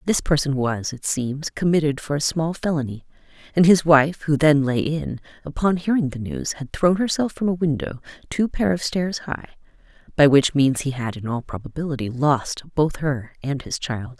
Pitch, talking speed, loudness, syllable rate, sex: 145 Hz, 195 wpm, -21 LUFS, 4.8 syllables/s, female